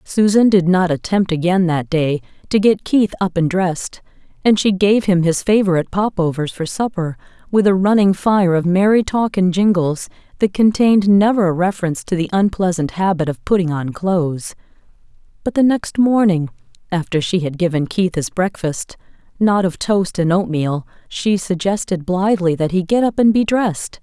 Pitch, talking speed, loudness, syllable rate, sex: 185 Hz, 175 wpm, -16 LUFS, 4.9 syllables/s, female